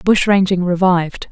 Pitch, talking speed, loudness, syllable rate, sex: 185 Hz, 135 wpm, -15 LUFS, 5.0 syllables/s, female